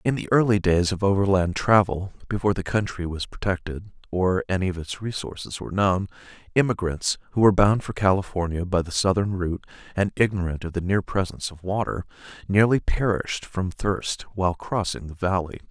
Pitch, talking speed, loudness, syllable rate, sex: 95 Hz, 170 wpm, -24 LUFS, 5.7 syllables/s, male